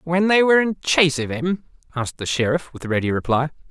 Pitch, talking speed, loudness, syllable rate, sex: 155 Hz, 210 wpm, -20 LUFS, 6.2 syllables/s, male